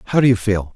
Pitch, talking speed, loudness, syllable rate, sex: 110 Hz, 320 wpm, -17 LUFS, 8.2 syllables/s, male